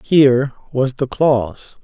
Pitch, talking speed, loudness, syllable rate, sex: 135 Hz, 130 wpm, -16 LUFS, 4.0 syllables/s, male